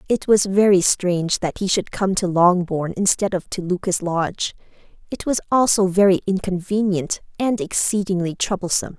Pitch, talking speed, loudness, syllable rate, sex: 190 Hz, 155 wpm, -20 LUFS, 5.0 syllables/s, female